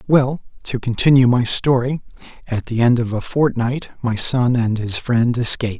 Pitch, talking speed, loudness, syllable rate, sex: 120 Hz, 165 wpm, -18 LUFS, 4.7 syllables/s, male